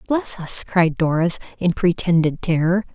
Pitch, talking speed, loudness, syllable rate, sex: 175 Hz, 140 wpm, -19 LUFS, 4.4 syllables/s, female